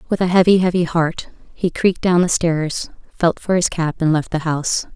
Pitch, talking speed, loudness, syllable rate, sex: 170 Hz, 220 wpm, -18 LUFS, 5.1 syllables/s, female